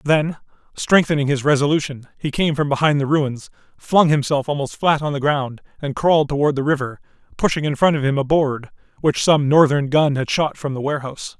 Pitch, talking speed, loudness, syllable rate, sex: 145 Hz, 200 wpm, -19 LUFS, 5.7 syllables/s, male